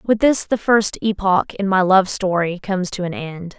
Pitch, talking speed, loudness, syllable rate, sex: 190 Hz, 220 wpm, -18 LUFS, 4.6 syllables/s, female